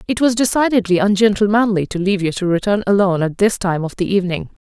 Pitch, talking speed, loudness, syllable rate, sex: 200 Hz, 205 wpm, -16 LUFS, 6.7 syllables/s, female